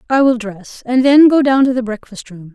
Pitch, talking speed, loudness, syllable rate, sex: 245 Hz, 260 wpm, -12 LUFS, 5.2 syllables/s, female